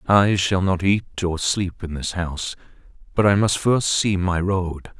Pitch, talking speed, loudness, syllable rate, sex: 95 Hz, 190 wpm, -21 LUFS, 4.2 syllables/s, male